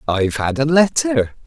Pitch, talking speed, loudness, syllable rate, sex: 140 Hz, 165 wpm, -17 LUFS, 5.0 syllables/s, male